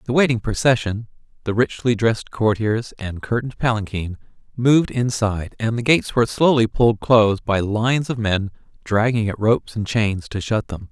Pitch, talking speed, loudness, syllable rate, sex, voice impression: 110 Hz, 170 wpm, -20 LUFS, 5.4 syllables/s, male, masculine, slightly adult-like, fluent, cool, calm